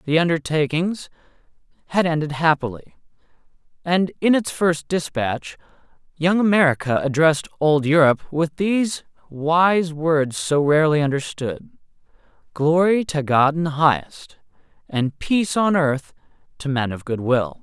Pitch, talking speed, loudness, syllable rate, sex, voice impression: 155 Hz, 125 wpm, -20 LUFS, 4.6 syllables/s, male, very masculine, very adult-like, thick, tensed, slightly powerful, bright, slightly soft, clear, fluent, cool, intellectual, very refreshing, sincere, calm, friendly, reassuring, slightly unique, elegant, slightly wild, sweet, lively, kind